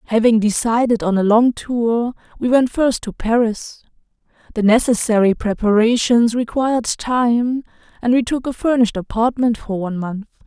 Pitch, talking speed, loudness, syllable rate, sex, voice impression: 230 Hz, 145 wpm, -17 LUFS, 4.9 syllables/s, female, feminine, adult-like, slightly calm, elegant, slightly sweet